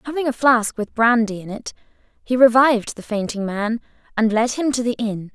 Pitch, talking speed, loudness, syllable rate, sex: 230 Hz, 200 wpm, -19 LUFS, 5.3 syllables/s, female